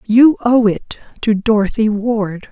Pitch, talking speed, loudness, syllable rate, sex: 220 Hz, 145 wpm, -15 LUFS, 3.9 syllables/s, female